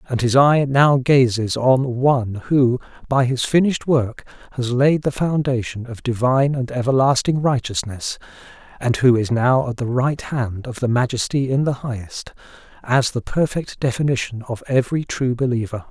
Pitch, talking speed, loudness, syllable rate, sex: 125 Hz, 160 wpm, -19 LUFS, 4.8 syllables/s, male